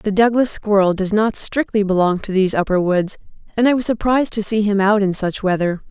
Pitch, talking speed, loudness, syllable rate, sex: 205 Hz, 225 wpm, -17 LUFS, 5.7 syllables/s, female